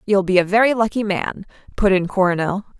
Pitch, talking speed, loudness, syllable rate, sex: 195 Hz, 195 wpm, -18 LUFS, 5.9 syllables/s, female